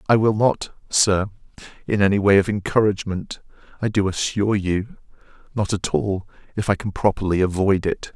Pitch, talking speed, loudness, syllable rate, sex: 100 Hz, 160 wpm, -21 LUFS, 5.3 syllables/s, male